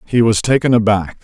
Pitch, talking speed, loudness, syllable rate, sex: 110 Hz, 195 wpm, -14 LUFS, 6.1 syllables/s, male